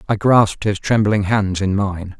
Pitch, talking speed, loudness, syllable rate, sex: 100 Hz, 190 wpm, -17 LUFS, 4.5 syllables/s, male